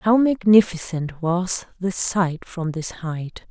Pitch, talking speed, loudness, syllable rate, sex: 180 Hz, 135 wpm, -21 LUFS, 3.3 syllables/s, female